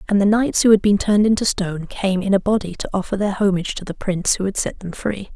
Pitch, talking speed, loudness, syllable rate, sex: 200 Hz, 280 wpm, -19 LUFS, 6.4 syllables/s, female